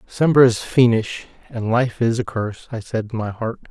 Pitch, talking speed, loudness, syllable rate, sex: 115 Hz, 210 wpm, -19 LUFS, 5.1 syllables/s, male